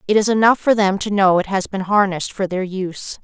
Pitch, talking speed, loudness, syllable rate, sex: 195 Hz, 260 wpm, -17 LUFS, 5.9 syllables/s, female